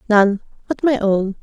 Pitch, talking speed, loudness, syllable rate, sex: 220 Hz, 170 wpm, -18 LUFS, 4.2 syllables/s, female